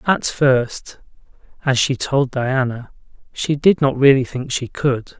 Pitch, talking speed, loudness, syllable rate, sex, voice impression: 135 Hz, 150 wpm, -18 LUFS, 3.7 syllables/s, male, very masculine, slightly old, very thick, slightly tensed, slightly weak, slightly bright, slightly soft, clear, fluent, slightly cool, intellectual, slightly refreshing, sincere, calm, mature, slightly friendly, slightly reassuring, slightly unique, slightly elegant, wild, sweet, slightly lively, kind, modest